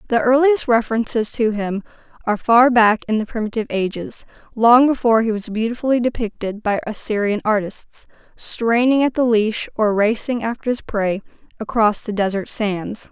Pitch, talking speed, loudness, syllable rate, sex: 225 Hz, 155 wpm, -18 LUFS, 5.1 syllables/s, female